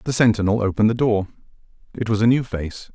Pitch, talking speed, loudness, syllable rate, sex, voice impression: 110 Hz, 205 wpm, -20 LUFS, 6.6 syllables/s, male, very masculine, slightly old, very thick, slightly relaxed, very powerful, slightly dark, slightly soft, muffled, slightly fluent, slightly raspy, cool, intellectual, refreshing, slightly sincere, calm, very mature, very friendly, reassuring, very unique, elegant, very wild, sweet, lively, slightly strict, slightly intense, slightly modest